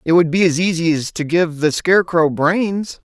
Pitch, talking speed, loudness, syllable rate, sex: 165 Hz, 210 wpm, -16 LUFS, 4.8 syllables/s, male